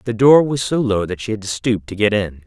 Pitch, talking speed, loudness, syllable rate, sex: 110 Hz, 315 wpm, -17 LUFS, 5.4 syllables/s, male